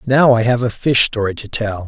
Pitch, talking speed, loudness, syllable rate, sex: 115 Hz, 255 wpm, -15 LUFS, 5.1 syllables/s, male